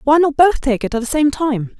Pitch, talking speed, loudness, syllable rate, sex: 280 Hz, 300 wpm, -16 LUFS, 5.3 syllables/s, female